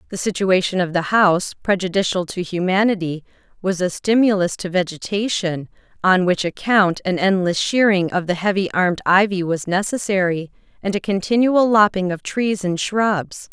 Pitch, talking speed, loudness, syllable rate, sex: 190 Hz, 150 wpm, -19 LUFS, 5.0 syllables/s, female